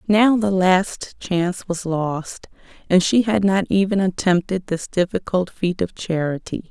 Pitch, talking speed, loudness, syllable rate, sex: 185 Hz, 150 wpm, -20 LUFS, 4.1 syllables/s, female